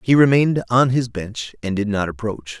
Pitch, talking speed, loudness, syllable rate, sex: 115 Hz, 210 wpm, -19 LUFS, 5.1 syllables/s, male